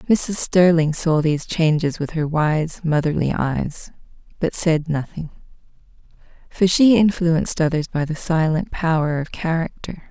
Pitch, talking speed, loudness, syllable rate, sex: 160 Hz, 135 wpm, -19 LUFS, 4.3 syllables/s, female